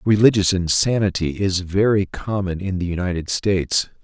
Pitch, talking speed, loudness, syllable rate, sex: 95 Hz, 135 wpm, -20 LUFS, 5.0 syllables/s, male